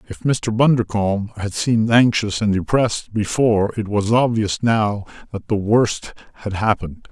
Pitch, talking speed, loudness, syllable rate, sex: 110 Hz, 150 wpm, -19 LUFS, 4.9 syllables/s, male